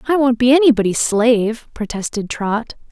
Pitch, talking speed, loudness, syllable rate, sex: 235 Hz, 145 wpm, -16 LUFS, 5.0 syllables/s, female